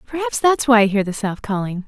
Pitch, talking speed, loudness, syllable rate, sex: 230 Hz, 290 wpm, -18 LUFS, 6.4 syllables/s, female